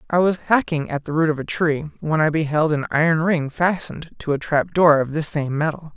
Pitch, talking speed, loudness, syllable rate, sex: 155 Hz, 230 wpm, -20 LUFS, 5.4 syllables/s, male